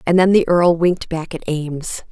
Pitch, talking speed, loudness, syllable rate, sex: 170 Hz, 225 wpm, -17 LUFS, 5.3 syllables/s, female